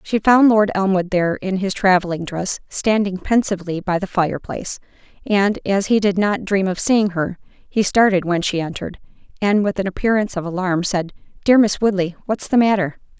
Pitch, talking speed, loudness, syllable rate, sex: 195 Hz, 185 wpm, -18 LUFS, 5.3 syllables/s, female